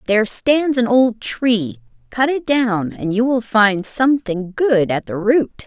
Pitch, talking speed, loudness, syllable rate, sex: 230 Hz, 180 wpm, -17 LUFS, 3.9 syllables/s, female